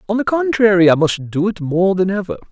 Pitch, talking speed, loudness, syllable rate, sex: 195 Hz, 240 wpm, -15 LUFS, 6.0 syllables/s, male